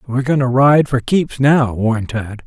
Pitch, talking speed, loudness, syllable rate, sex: 130 Hz, 220 wpm, -15 LUFS, 4.7 syllables/s, male